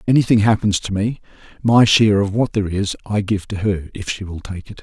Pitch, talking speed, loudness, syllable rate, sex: 105 Hz, 250 wpm, -18 LUFS, 6.1 syllables/s, male